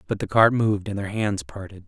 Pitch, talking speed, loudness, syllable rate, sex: 100 Hz, 255 wpm, -22 LUFS, 5.9 syllables/s, male